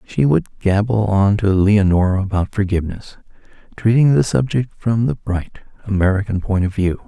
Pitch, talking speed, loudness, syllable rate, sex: 100 Hz, 145 wpm, -17 LUFS, 5.0 syllables/s, male